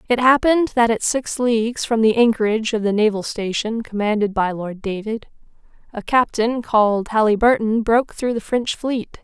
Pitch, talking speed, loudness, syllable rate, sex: 225 Hz, 170 wpm, -19 LUFS, 5.1 syllables/s, female